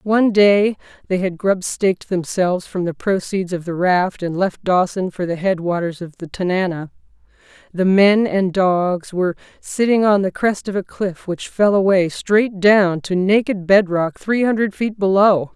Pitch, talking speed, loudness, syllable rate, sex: 190 Hz, 185 wpm, -18 LUFS, 2.8 syllables/s, female